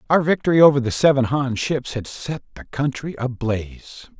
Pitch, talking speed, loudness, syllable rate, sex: 135 Hz, 170 wpm, -20 LUFS, 5.0 syllables/s, male